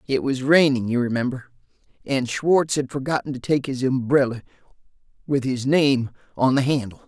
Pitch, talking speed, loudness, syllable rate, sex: 130 Hz, 160 wpm, -21 LUFS, 5.2 syllables/s, male